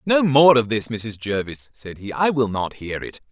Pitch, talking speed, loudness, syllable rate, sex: 120 Hz, 235 wpm, -20 LUFS, 4.5 syllables/s, male